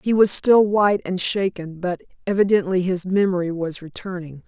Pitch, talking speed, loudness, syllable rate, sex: 185 Hz, 160 wpm, -20 LUFS, 5.1 syllables/s, female